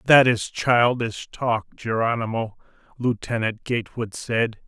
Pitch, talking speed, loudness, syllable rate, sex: 115 Hz, 105 wpm, -23 LUFS, 4.0 syllables/s, male